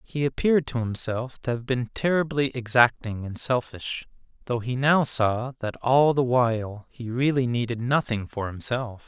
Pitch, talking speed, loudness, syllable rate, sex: 125 Hz, 165 wpm, -25 LUFS, 4.5 syllables/s, male